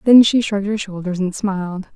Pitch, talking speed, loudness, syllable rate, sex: 200 Hz, 215 wpm, -18 LUFS, 5.7 syllables/s, female